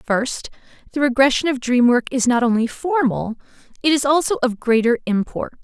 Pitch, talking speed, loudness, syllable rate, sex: 260 Hz, 170 wpm, -18 LUFS, 5.2 syllables/s, female